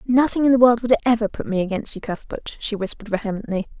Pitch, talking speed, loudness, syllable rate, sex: 225 Hz, 220 wpm, -20 LUFS, 6.7 syllables/s, female